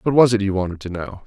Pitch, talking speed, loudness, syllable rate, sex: 105 Hz, 330 wpm, -20 LUFS, 7.0 syllables/s, male